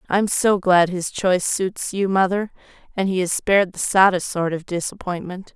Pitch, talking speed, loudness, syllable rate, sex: 185 Hz, 185 wpm, -20 LUFS, 4.9 syllables/s, female